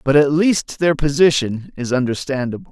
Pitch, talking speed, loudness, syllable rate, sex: 140 Hz, 155 wpm, -17 LUFS, 5.0 syllables/s, male